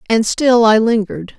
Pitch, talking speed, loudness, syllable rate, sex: 220 Hz, 175 wpm, -13 LUFS, 5.0 syllables/s, female